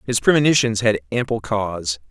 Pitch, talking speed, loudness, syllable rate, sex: 110 Hz, 140 wpm, -19 LUFS, 5.4 syllables/s, male